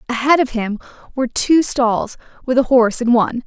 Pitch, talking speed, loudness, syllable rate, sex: 245 Hz, 190 wpm, -16 LUFS, 5.7 syllables/s, female